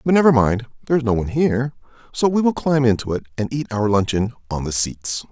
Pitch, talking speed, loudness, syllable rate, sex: 120 Hz, 225 wpm, -20 LUFS, 6.1 syllables/s, male